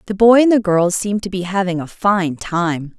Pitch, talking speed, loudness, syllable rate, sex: 190 Hz, 240 wpm, -16 LUFS, 5.0 syllables/s, female